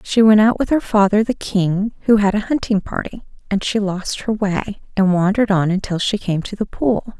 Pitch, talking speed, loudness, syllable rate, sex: 205 Hz, 225 wpm, -18 LUFS, 5.0 syllables/s, female